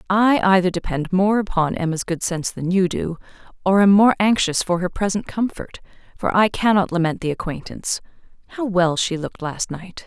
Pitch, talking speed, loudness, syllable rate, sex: 185 Hz, 185 wpm, -20 LUFS, 5.3 syllables/s, female